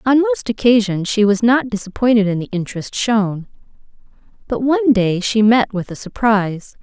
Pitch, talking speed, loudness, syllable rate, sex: 220 Hz, 165 wpm, -16 LUFS, 5.1 syllables/s, female